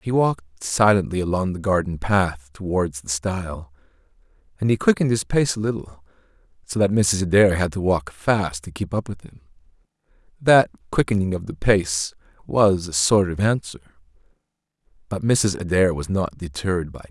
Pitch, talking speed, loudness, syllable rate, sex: 95 Hz, 170 wpm, -21 LUFS, 5.0 syllables/s, male